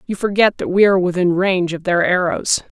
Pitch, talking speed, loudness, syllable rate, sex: 185 Hz, 215 wpm, -16 LUFS, 6.0 syllables/s, female